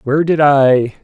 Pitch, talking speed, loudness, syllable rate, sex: 140 Hz, 175 wpm, -12 LUFS, 4.6 syllables/s, male